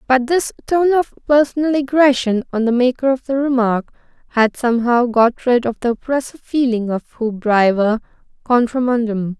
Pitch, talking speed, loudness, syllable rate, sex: 250 Hz, 155 wpm, -17 LUFS, 5.1 syllables/s, female